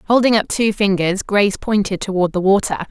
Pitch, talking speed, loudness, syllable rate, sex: 200 Hz, 185 wpm, -17 LUFS, 5.6 syllables/s, female